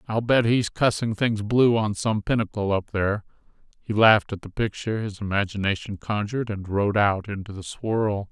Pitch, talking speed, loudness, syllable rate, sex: 105 Hz, 180 wpm, -24 LUFS, 5.2 syllables/s, male